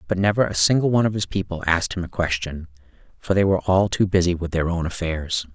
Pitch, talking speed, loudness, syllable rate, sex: 90 Hz, 240 wpm, -21 LUFS, 6.4 syllables/s, male